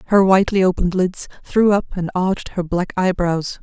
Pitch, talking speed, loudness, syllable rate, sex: 185 Hz, 180 wpm, -18 LUFS, 5.5 syllables/s, female